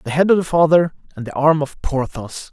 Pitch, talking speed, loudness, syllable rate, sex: 150 Hz, 240 wpm, -17 LUFS, 5.5 syllables/s, male